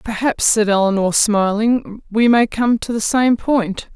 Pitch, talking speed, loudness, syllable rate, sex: 220 Hz, 165 wpm, -16 LUFS, 4.0 syllables/s, female